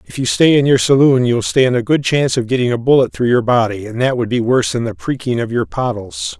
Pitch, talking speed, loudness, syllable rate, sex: 125 Hz, 270 wpm, -15 LUFS, 5.9 syllables/s, male